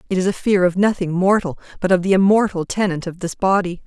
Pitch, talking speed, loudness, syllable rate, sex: 185 Hz, 235 wpm, -18 LUFS, 6.1 syllables/s, female